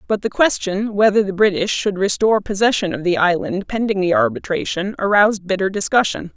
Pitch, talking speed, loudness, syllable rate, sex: 200 Hz, 170 wpm, -18 LUFS, 5.7 syllables/s, female